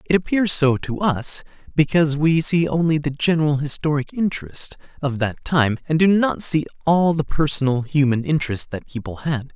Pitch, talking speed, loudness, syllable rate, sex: 150 Hz, 175 wpm, -20 LUFS, 5.2 syllables/s, male